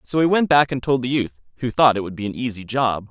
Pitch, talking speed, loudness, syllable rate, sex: 125 Hz, 310 wpm, -20 LUFS, 6.1 syllables/s, male